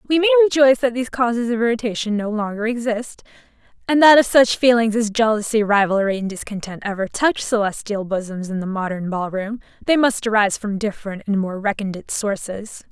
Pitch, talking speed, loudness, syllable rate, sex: 220 Hz, 180 wpm, -19 LUFS, 5.9 syllables/s, female